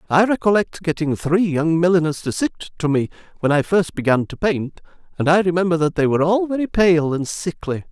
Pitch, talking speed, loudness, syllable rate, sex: 165 Hz, 205 wpm, -19 LUFS, 5.7 syllables/s, male